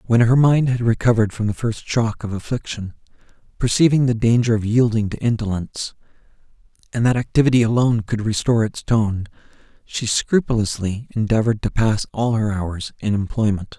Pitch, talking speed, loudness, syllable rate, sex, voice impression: 115 Hz, 155 wpm, -19 LUFS, 5.6 syllables/s, male, masculine, slightly gender-neutral, slightly young, slightly adult-like, slightly thick, very relaxed, weak, very dark, very soft, very muffled, fluent, slightly raspy, very cool, intellectual, slightly refreshing, very sincere, very calm, slightly mature, friendly, very reassuring, slightly unique, very elegant, slightly wild, very sweet, very kind, very modest